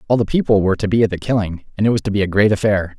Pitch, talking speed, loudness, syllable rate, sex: 105 Hz, 340 wpm, -17 LUFS, 7.8 syllables/s, male